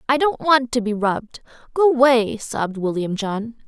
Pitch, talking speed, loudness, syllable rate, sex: 240 Hz, 145 wpm, -19 LUFS, 4.2 syllables/s, female